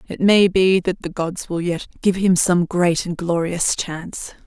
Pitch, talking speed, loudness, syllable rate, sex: 180 Hz, 200 wpm, -19 LUFS, 4.2 syllables/s, female